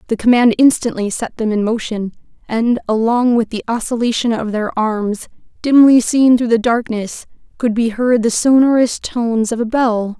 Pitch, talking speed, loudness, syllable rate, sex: 230 Hz, 160 wpm, -15 LUFS, 4.7 syllables/s, female